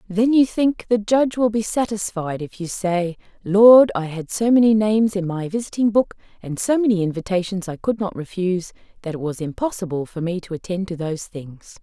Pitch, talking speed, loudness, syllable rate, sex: 195 Hz, 205 wpm, -20 LUFS, 5.4 syllables/s, female